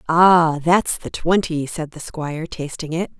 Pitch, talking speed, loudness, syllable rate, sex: 160 Hz, 170 wpm, -19 LUFS, 4.1 syllables/s, female